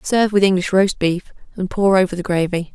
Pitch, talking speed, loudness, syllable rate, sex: 185 Hz, 220 wpm, -18 LUFS, 5.7 syllables/s, female